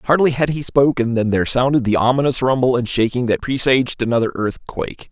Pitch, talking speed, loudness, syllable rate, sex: 125 Hz, 190 wpm, -17 LUFS, 6.0 syllables/s, male